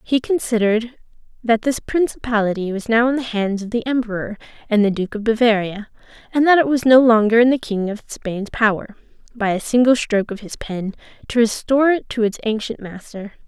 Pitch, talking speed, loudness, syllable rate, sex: 225 Hz, 195 wpm, -18 LUFS, 5.6 syllables/s, female